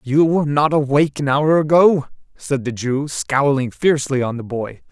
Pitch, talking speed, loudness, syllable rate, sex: 140 Hz, 185 wpm, -17 LUFS, 4.9 syllables/s, male